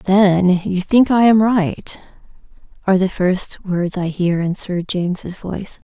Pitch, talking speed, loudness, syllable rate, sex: 190 Hz, 165 wpm, -17 LUFS, 3.9 syllables/s, female